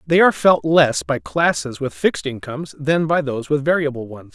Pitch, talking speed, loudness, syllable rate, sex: 140 Hz, 205 wpm, -18 LUFS, 5.5 syllables/s, male